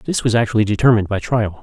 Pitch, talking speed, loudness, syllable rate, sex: 110 Hz, 220 wpm, -17 LUFS, 6.9 syllables/s, male